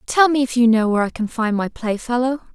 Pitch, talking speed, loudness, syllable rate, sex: 240 Hz, 260 wpm, -19 LUFS, 5.9 syllables/s, female